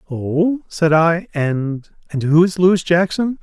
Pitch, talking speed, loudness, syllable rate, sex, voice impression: 170 Hz, 140 wpm, -17 LUFS, 3.4 syllables/s, male, masculine, adult-like, tensed, powerful, clear, fluent, slightly raspy, cool, intellectual, slightly mature, friendly, wild, lively